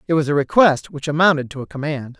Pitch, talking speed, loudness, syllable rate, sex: 150 Hz, 245 wpm, -18 LUFS, 6.4 syllables/s, male